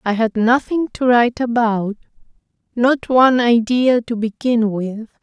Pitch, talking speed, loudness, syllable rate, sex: 235 Hz, 140 wpm, -16 LUFS, 4.2 syllables/s, female